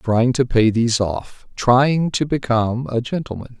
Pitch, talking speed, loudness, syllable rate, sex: 125 Hz, 185 wpm, -18 LUFS, 5.1 syllables/s, male